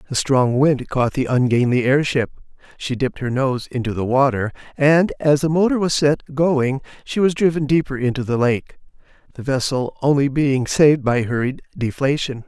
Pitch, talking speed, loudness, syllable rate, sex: 135 Hz, 175 wpm, -19 LUFS, 5.0 syllables/s, male